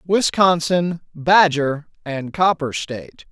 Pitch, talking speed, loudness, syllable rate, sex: 160 Hz, 90 wpm, -18 LUFS, 3.4 syllables/s, male